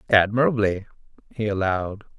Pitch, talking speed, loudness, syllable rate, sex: 105 Hz, 80 wpm, -23 LUFS, 5.6 syllables/s, male